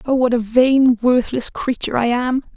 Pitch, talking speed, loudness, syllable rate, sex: 245 Hz, 190 wpm, -17 LUFS, 4.7 syllables/s, female